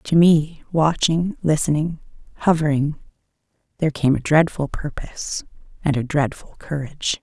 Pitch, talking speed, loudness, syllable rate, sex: 155 Hz, 115 wpm, -21 LUFS, 4.9 syllables/s, female